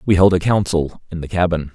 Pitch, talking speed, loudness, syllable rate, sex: 90 Hz, 240 wpm, -17 LUFS, 5.9 syllables/s, male